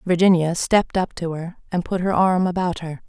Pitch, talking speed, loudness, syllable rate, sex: 175 Hz, 215 wpm, -21 LUFS, 5.3 syllables/s, female